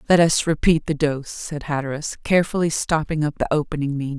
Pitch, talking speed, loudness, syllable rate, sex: 150 Hz, 185 wpm, -21 LUFS, 6.3 syllables/s, female